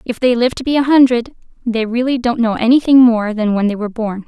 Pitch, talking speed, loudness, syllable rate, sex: 240 Hz, 255 wpm, -14 LUFS, 5.9 syllables/s, female